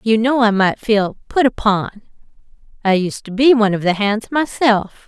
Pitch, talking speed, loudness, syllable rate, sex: 215 Hz, 190 wpm, -16 LUFS, 4.7 syllables/s, female